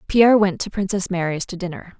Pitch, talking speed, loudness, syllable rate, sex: 190 Hz, 210 wpm, -20 LUFS, 6.1 syllables/s, female